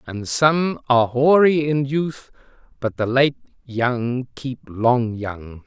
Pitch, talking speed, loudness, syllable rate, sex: 130 Hz, 140 wpm, -20 LUFS, 3.3 syllables/s, male